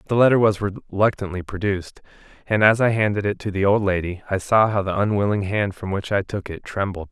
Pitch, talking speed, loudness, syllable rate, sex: 100 Hz, 220 wpm, -21 LUFS, 5.8 syllables/s, male